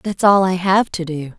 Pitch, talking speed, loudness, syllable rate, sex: 180 Hz, 260 wpm, -16 LUFS, 4.6 syllables/s, female